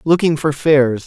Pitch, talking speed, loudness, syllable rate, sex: 145 Hz, 170 wpm, -15 LUFS, 5.2 syllables/s, male